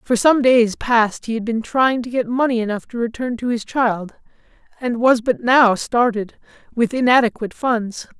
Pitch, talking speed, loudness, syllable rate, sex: 235 Hz, 185 wpm, -18 LUFS, 4.6 syllables/s, male